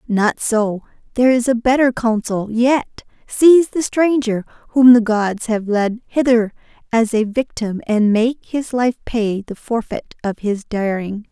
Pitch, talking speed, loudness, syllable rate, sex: 230 Hz, 160 wpm, -17 LUFS, 4.1 syllables/s, female